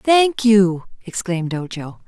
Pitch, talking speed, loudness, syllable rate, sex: 200 Hz, 115 wpm, -18 LUFS, 3.8 syllables/s, female